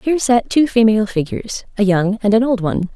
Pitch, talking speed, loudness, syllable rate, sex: 220 Hz, 225 wpm, -16 LUFS, 6.4 syllables/s, female